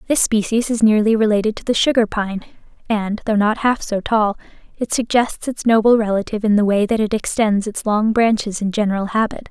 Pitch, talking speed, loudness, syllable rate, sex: 215 Hz, 200 wpm, -18 LUFS, 5.6 syllables/s, female